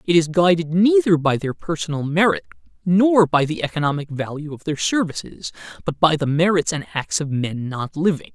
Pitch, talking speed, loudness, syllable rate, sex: 160 Hz, 185 wpm, -20 LUFS, 5.2 syllables/s, male